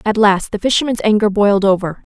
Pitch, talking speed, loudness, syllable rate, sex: 205 Hz, 190 wpm, -14 LUFS, 6.1 syllables/s, female